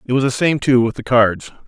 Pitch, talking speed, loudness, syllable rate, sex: 125 Hz, 285 wpm, -16 LUFS, 5.6 syllables/s, male